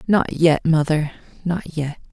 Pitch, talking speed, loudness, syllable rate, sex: 160 Hz, 140 wpm, -20 LUFS, 3.8 syllables/s, female